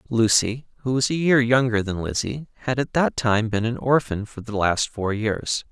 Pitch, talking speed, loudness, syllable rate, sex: 120 Hz, 210 wpm, -22 LUFS, 4.7 syllables/s, male